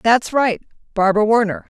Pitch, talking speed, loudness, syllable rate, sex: 220 Hz, 135 wpm, -17 LUFS, 5.4 syllables/s, female